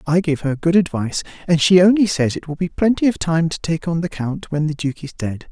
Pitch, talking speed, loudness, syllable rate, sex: 165 Hz, 270 wpm, -18 LUFS, 5.7 syllables/s, male